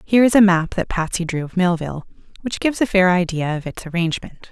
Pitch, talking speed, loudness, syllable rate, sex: 185 Hz, 225 wpm, -19 LUFS, 6.4 syllables/s, female